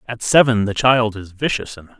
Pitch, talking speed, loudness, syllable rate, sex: 115 Hz, 270 wpm, -17 LUFS, 6.0 syllables/s, male